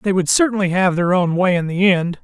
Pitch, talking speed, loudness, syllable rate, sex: 185 Hz, 270 wpm, -16 LUFS, 5.5 syllables/s, male